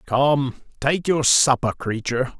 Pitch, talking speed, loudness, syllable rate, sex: 135 Hz, 125 wpm, -20 LUFS, 4.1 syllables/s, male